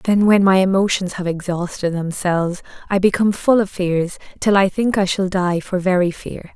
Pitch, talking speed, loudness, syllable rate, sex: 185 Hz, 190 wpm, -18 LUFS, 5.1 syllables/s, female